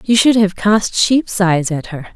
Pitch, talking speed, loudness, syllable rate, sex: 200 Hz, 225 wpm, -14 LUFS, 4.0 syllables/s, female